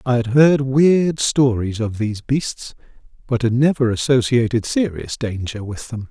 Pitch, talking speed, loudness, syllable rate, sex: 125 Hz, 155 wpm, -18 LUFS, 4.4 syllables/s, male